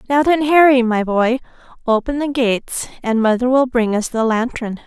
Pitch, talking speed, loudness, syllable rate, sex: 245 Hz, 185 wpm, -16 LUFS, 5.0 syllables/s, female